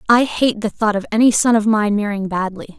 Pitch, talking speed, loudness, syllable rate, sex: 215 Hz, 235 wpm, -17 LUFS, 5.5 syllables/s, female